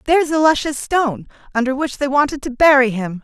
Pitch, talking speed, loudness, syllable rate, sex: 275 Hz, 185 wpm, -16 LUFS, 6.1 syllables/s, female